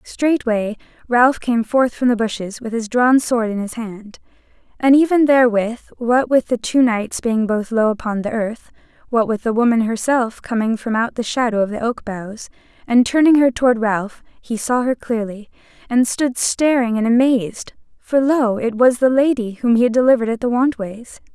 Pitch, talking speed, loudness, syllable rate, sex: 235 Hz, 195 wpm, -17 LUFS, 4.9 syllables/s, female